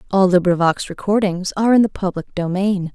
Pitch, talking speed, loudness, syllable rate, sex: 190 Hz, 165 wpm, -18 LUFS, 5.6 syllables/s, female